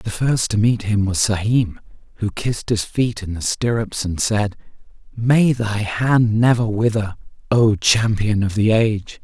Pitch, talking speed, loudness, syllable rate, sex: 110 Hz, 170 wpm, -19 LUFS, 4.2 syllables/s, male